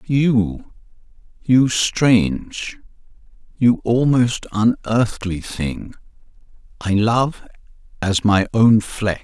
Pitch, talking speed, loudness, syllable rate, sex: 110 Hz, 70 wpm, -18 LUFS, 2.8 syllables/s, male